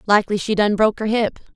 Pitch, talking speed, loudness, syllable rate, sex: 210 Hz, 230 wpm, -19 LUFS, 7.0 syllables/s, female